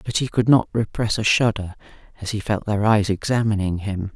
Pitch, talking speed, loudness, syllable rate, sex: 105 Hz, 200 wpm, -21 LUFS, 5.3 syllables/s, female